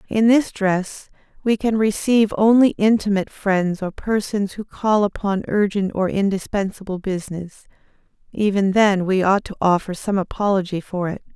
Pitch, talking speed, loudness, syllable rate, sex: 200 Hz, 150 wpm, -20 LUFS, 4.9 syllables/s, female